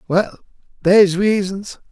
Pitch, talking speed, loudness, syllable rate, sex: 195 Hz, 95 wpm, -16 LUFS, 3.2 syllables/s, male